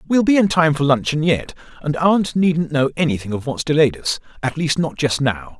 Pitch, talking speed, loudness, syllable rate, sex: 150 Hz, 215 wpm, -18 LUFS, 5.1 syllables/s, male